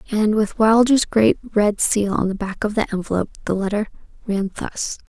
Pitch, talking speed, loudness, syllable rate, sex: 210 Hz, 190 wpm, -20 LUFS, 5.1 syllables/s, female